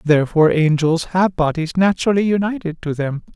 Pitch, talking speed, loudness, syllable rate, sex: 170 Hz, 145 wpm, -17 LUFS, 5.7 syllables/s, male